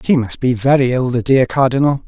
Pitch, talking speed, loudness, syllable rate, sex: 130 Hz, 230 wpm, -15 LUFS, 5.6 syllables/s, male